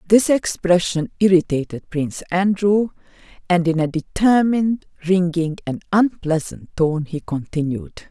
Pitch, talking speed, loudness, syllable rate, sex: 175 Hz, 110 wpm, -19 LUFS, 4.5 syllables/s, female